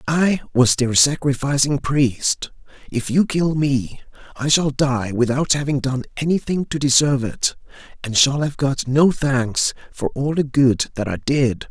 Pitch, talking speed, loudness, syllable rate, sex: 135 Hz, 165 wpm, -19 LUFS, 4.2 syllables/s, male